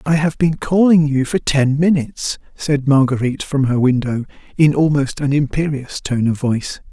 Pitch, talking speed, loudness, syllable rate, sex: 145 Hz, 175 wpm, -17 LUFS, 5.0 syllables/s, male